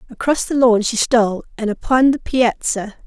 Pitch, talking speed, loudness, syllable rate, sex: 235 Hz, 175 wpm, -17 LUFS, 4.9 syllables/s, female